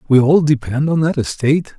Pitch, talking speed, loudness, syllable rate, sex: 145 Hz, 200 wpm, -15 LUFS, 5.7 syllables/s, male